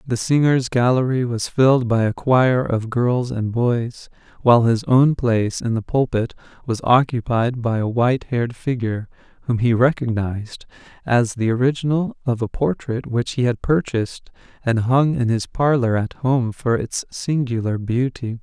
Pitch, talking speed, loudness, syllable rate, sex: 120 Hz, 165 wpm, -20 LUFS, 4.6 syllables/s, male